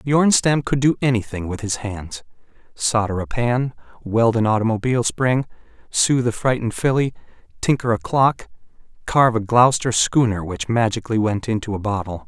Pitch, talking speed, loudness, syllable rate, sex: 115 Hz, 145 wpm, -20 LUFS, 5.3 syllables/s, male